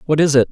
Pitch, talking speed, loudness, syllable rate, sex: 145 Hz, 350 wpm, -14 LUFS, 8.3 syllables/s, male